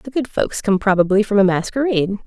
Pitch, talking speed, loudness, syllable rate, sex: 210 Hz, 210 wpm, -17 LUFS, 6.1 syllables/s, female